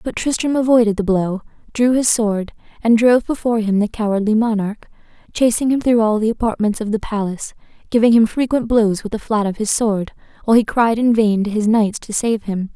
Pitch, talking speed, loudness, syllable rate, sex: 220 Hz, 210 wpm, -17 LUFS, 5.7 syllables/s, female